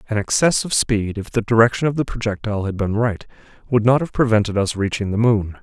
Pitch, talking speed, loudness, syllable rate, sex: 110 Hz, 225 wpm, -19 LUFS, 6.0 syllables/s, male